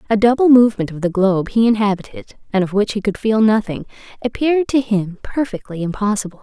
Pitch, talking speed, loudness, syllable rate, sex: 215 Hz, 185 wpm, -17 LUFS, 6.2 syllables/s, female